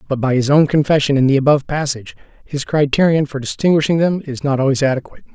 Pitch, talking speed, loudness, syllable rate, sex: 140 Hz, 200 wpm, -16 LUFS, 6.9 syllables/s, male